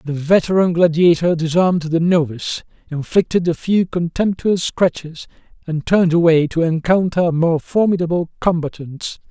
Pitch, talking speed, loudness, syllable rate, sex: 170 Hz, 125 wpm, -17 LUFS, 4.9 syllables/s, male